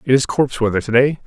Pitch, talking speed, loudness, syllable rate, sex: 130 Hz, 240 wpm, -17 LUFS, 7.2 syllables/s, male